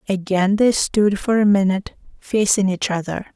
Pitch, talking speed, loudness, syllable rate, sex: 200 Hz, 160 wpm, -18 LUFS, 4.9 syllables/s, female